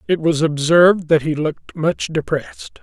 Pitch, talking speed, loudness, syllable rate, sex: 160 Hz, 170 wpm, -17 LUFS, 4.9 syllables/s, male